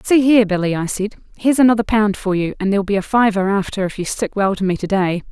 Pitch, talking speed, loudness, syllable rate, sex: 205 Hz, 270 wpm, -17 LUFS, 6.5 syllables/s, female